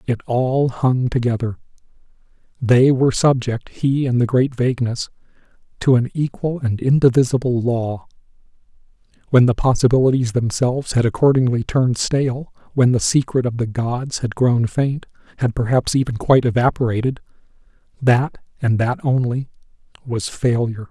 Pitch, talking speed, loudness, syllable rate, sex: 125 Hz, 130 wpm, -18 LUFS, 5.0 syllables/s, male